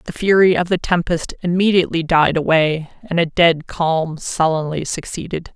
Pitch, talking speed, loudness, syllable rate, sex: 170 Hz, 150 wpm, -17 LUFS, 4.7 syllables/s, female